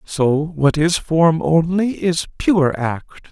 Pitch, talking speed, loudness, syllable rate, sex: 160 Hz, 145 wpm, -17 LUFS, 3.1 syllables/s, male